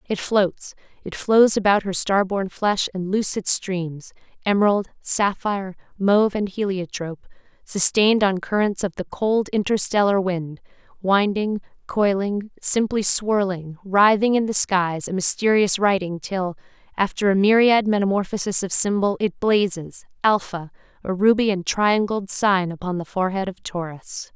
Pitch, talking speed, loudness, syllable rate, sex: 195 Hz, 140 wpm, -21 LUFS, 4.6 syllables/s, female